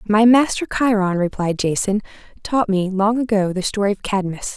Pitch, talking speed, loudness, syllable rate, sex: 205 Hz, 170 wpm, -19 LUFS, 5.1 syllables/s, female